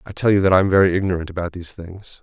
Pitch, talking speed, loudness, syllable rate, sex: 90 Hz, 295 wpm, -18 LUFS, 7.6 syllables/s, male